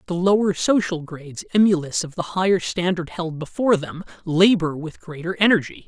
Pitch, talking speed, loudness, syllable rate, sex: 175 Hz, 165 wpm, -21 LUFS, 5.4 syllables/s, male